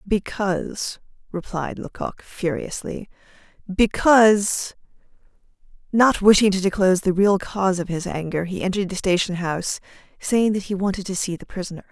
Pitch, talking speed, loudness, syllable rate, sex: 190 Hz, 140 wpm, -21 LUFS, 5.3 syllables/s, female